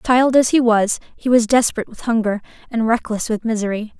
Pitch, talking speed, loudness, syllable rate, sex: 230 Hz, 195 wpm, -18 LUFS, 5.9 syllables/s, female